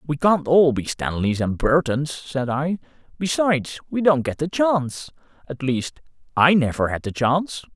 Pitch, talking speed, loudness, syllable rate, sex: 145 Hz, 160 wpm, -21 LUFS, 4.6 syllables/s, male